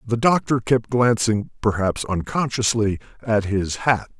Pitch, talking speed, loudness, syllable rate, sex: 110 Hz, 130 wpm, -21 LUFS, 4.2 syllables/s, male